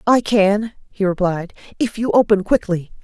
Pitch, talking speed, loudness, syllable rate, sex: 205 Hz, 160 wpm, -18 LUFS, 4.6 syllables/s, female